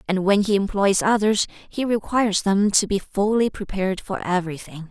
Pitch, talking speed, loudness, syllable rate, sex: 200 Hz, 170 wpm, -21 LUFS, 5.1 syllables/s, female